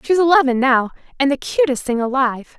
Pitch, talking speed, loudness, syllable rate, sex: 270 Hz, 185 wpm, -17 LUFS, 5.9 syllables/s, female